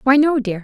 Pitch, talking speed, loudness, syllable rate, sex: 255 Hz, 285 wpm, -16 LUFS, 5.7 syllables/s, female